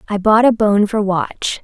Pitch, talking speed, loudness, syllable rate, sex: 210 Hz, 220 wpm, -15 LUFS, 4.1 syllables/s, female